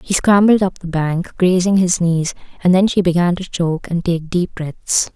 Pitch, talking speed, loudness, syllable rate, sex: 175 Hz, 210 wpm, -16 LUFS, 4.6 syllables/s, female